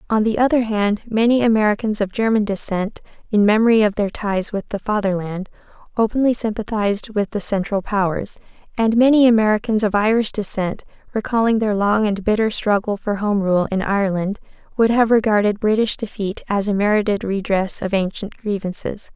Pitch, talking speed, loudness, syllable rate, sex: 210 Hz, 165 wpm, -19 LUFS, 5.4 syllables/s, female